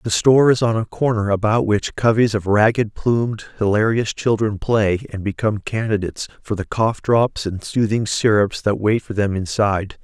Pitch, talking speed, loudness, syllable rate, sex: 105 Hz, 180 wpm, -19 LUFS, 5.0 syllables/s, male